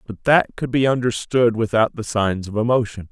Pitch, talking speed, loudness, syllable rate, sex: 115 Hz, 195 wpm, -19 LUFS, 5.1 syllables/s, male